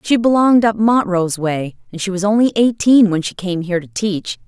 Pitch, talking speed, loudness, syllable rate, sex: 200 Hz, 215 wpm, -16 LUFS, 5.6 syllables/s, female